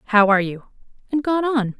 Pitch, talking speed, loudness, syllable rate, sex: 235 Hz, 200 wpm, -19 LUFS, 6.6 syllables/s, female